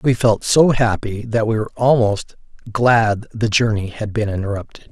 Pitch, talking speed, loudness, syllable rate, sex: 110 Hz, 170 wpm, -18 LUFS, 4.7 syllables/s, male